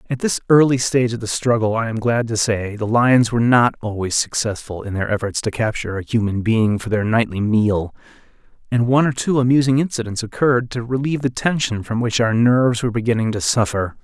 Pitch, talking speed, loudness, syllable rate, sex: 115 Hz, 210 wpm, -18 LUFS, 5.9 syllables/s, male